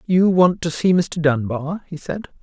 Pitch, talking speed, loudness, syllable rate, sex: 165 Hz, 200 wpm, -19 LUFS, 4.1 syllables/s, male